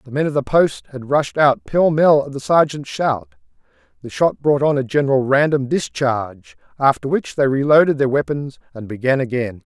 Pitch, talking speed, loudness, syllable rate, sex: 135 Hz, 190 wpm, -17 LUFS, 5.1 syllables/s, male